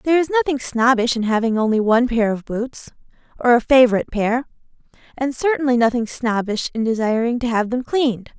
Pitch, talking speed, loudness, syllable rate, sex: 240 Hz, 180 wpm, -18 LUFS, 6.2 syllables/s, female